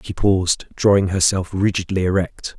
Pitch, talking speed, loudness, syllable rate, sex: 95 Hz, 140 wpm, -19 LUFS, 5.0 syllables/s, male